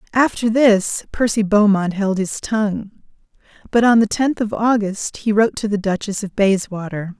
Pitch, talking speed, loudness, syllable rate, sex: 210 Hz, 165 wpm, -18 LUFS, 4.8 syllables/s, female